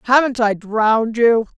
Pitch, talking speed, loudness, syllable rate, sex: 230 Hz, 150 wpm, -16 LUFS, 4.4 syllables/s, female